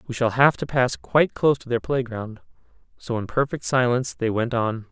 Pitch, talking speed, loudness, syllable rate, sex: 120 Hz, 210 wpm, -22 LUFS, 5.5 syllables/s, male